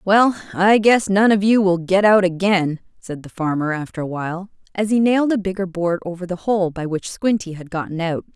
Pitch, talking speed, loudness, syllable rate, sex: 185 Hz, 225 wpm, -19 LUFS, 5.3 syllables/s, female